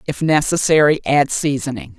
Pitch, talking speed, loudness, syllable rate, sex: 145 Hz, 120 wpm, -16 LUFS, 4.9 syllables/s, female